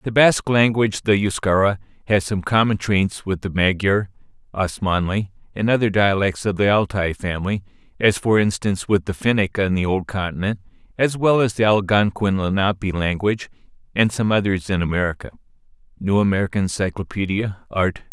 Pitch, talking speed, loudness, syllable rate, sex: 100 Hz, 145 wpm, -20 LUFS, 5.3 syllables/s, male